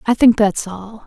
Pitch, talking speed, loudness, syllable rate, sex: 215 Hz, 225 wpm, -15 LUFS, 4.2 syllables/s, female